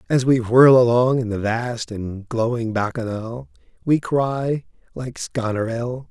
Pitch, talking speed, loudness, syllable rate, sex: 115 Hz, 140 wpm, -20 LUFS, 4.0 syllables/s, male